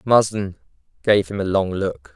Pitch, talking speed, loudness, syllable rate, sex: 100 Hz, 165 wpm, -21 LUFS, 4.4 syllables/s, male